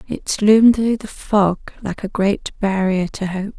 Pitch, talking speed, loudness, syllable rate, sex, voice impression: 200 Hz, 185 wpm, -18 LUFS, 4.1 syllables/s, female, very feminine, very thin, very relaxed, very weak, very dark, very soft, muffled, slightly halting, very raspy, very cute, very intellectual, slightly refreshing, sincere, very calm, very friendly, very reassuring, very unique, very elegant, slightly wild, very sweet, slightly lively, very kind, very modest, very light